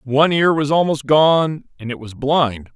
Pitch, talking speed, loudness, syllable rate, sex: 145 Hz, 195 wpm, -16 LUFS, 4.5 syllables/s, male